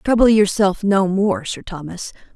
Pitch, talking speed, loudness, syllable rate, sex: 200 Hz, 155 wpm, -17 LUFS, 4.4 syllables/s, female